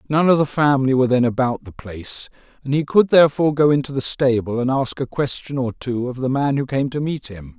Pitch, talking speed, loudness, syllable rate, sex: 135 Hz, 245 wpm, -19 LUFS, 6.0 syllables/s, male